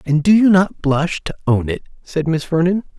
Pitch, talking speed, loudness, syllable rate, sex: 165 Hz, 220 wpm, -17 LUFS, 4.9 syllables/s, male